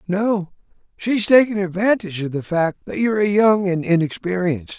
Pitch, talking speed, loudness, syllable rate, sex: 190 Hz, 165 wpm, -19 LUFS, 5.3 syllables/s, male